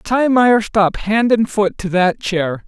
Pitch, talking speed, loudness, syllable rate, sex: 205 Hz, 155 wpm, -15 LUFS, 3.4 syllables/s, male